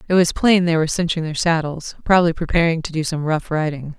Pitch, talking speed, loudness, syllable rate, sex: 165 Hz, 225 wpm, -19 LUFS, 6.2 syllables/s, female